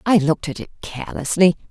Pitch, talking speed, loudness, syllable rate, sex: 170 Hz, 175 wpm, -20 LUFS, 6.6 syllables/s, female